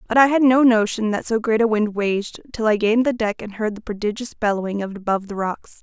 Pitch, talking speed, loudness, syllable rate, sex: 215 Hz, 270 wpm, -20 LUFS, 6.1 syllables/s, female